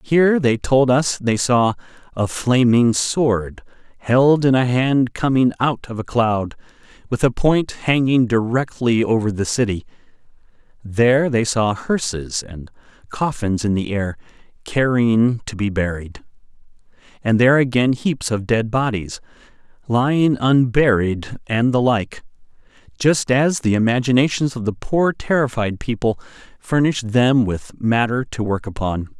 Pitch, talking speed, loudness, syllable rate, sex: 120 Hz, 140 wpm, -18 LUFS, 4.3 syllables/s, male